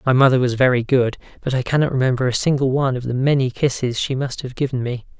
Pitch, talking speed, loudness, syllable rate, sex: 130 Hz, 240 wpm, -19 LUFS, 6.5 syllables/s, male